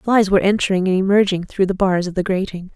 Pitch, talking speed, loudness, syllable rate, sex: 190 Hz, 240 wpm, -18 LUFS, 6.3 syllables/s, female